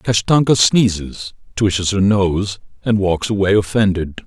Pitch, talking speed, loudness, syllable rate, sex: 100 Hz, 125 wpm, -16 LUFS, 4.3 syllables/s, male